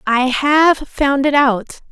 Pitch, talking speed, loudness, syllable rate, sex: 275 Hz, 155 wpm, -14 LUFS, 3.3 syllables/s, female